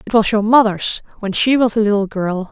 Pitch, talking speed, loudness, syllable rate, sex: 210 Hz, 240 wpm, -16 LUFS, 5.4 syllables/s, female